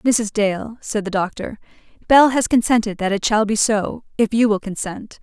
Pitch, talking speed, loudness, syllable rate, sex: 215 Hz, 195 wpm, -18 LUFS, 4.7 syllables/s, female